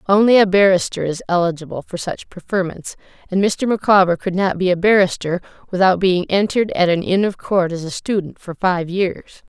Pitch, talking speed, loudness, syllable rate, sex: 185 Hz, 190 wpm, -17 LUFS, 5.4 syllables/s, female